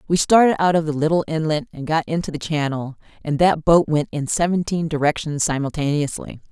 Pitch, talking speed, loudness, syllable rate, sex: 155 Hz, 185 wpm, -20 LUFS, 5.7 syllables/s, female